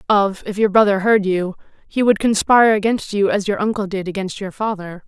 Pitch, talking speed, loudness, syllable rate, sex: 200 Hz, 215 wpm, -18 LUFS, 5.5 syllables/s, female